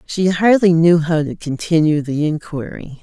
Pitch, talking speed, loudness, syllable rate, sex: 165 Hz, 160 wpm, -16 LUFS, 4.5 syllables/s, female